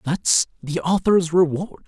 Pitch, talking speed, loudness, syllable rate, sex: 165 Hz, 130 wpm, -20 LUFS, 4.2 syllables/s, male